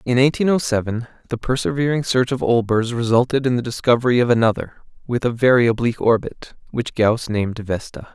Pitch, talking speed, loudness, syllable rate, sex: 120 Hz, 175 wpm, -19 LUFS, 5.9 syllables/s, male